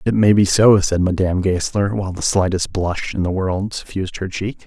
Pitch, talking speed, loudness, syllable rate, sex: 95 Hz, 220 wpm, -18 LUFS, 5.3 syllables/s, male